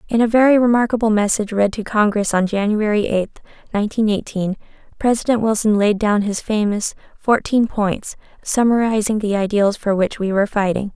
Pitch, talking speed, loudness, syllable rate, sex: 210 Hz, 160 wpm, -18 LUFS, 5.4 syllables/s, female